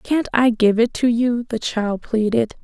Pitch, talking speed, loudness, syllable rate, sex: 225 Hz, 205 wpm, -19 LUFS, 4.0 syllables/s, female